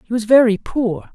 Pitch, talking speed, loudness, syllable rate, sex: 230 Hz, 210 wpm, -16 LUFS, 4.9 syllables/s, female